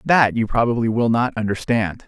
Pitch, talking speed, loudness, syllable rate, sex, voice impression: 115 Hz, 175 wpm, -19 LUFS, 5.1 syllables/s, male, masculine, adult-like, slightly cool, slightly intellectual, refreshing